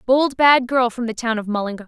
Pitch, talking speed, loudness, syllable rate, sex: 240 Hz, 255 wpm, -18 LUFS, 5.6 syllables/s, female